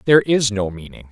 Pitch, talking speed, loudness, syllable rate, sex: 115 Hz, 215 wpm, -18 LUFS, 6.2 syllables/s, male